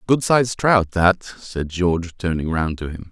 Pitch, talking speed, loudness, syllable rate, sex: 90 Hz, 195 wpm, -20 LUFS, 4.6 syllables/s, male